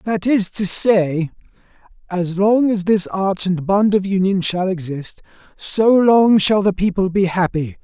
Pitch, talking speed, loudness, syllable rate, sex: 195 Hz, 170 wpm, -17 LUFS, 4.0 syllables/s, male